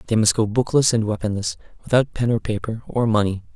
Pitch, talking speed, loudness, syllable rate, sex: 110 Hz, 205 wpm, -21 LUFS, 6.1 syllables/s, male